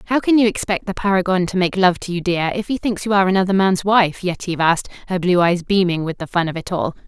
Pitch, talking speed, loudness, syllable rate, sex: 185 Hz, 270 wpm, -18 LUFS, 6.4 syllables/s, female